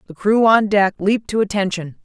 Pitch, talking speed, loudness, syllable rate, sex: 200 Hz, 205 wpm, -17 LUFS, 5.6 syllables/s, female